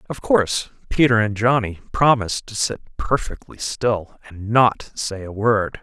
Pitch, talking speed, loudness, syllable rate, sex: 110 Hz, 155 wpm, -20 LUFS, 4.3 syllables/s, male